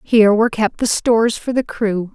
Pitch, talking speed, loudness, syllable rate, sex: 220 Hz, 225 wpm, -16 LUFS, 5.4 syllables/s, female